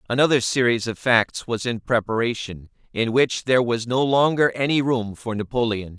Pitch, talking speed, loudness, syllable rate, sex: 120 Hz, 170 wpm, -21 LUFS, 5.0 syllables/s, male